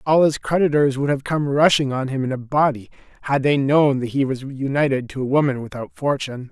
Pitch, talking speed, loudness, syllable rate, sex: 140 Hz, 220 wpm, -20 LUFS, 5.7 syllables/s, male